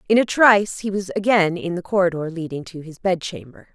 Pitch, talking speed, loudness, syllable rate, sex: 185 Hz, 225 wpm, -20 LUFS, 5.7 syllables/s, female